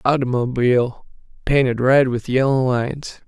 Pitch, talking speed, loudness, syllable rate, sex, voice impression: 130 Hz, 110 wpm, -18 LUFS, 2.9 syllables/s, male, masculine, slightly young, adult-like, thick, slightly relaxed, slightly weak, slightly dark, slightly soft, slightly muffled, slightly halting, slightly cool, slightly intellectual, slightly sincere, calm, slightly mature, slightly friendly, slightly unique, slightly wild, slightly kind, modest